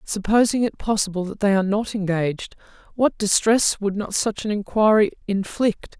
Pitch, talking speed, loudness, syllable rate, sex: 205 Hz, 160 wpm, -21 LUFS, 5.1 syllables/s, female